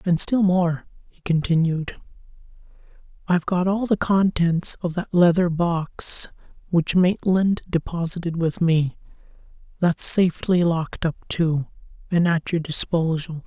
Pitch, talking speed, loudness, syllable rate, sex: 170 Hz, 120 wpm, -21 LUFS, 4.2 syllables/s, male